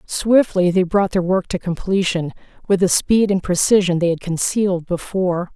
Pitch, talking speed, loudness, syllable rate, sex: 185 Hz, 175 wpm, -18 LUFS, 4.9 syllables/s, female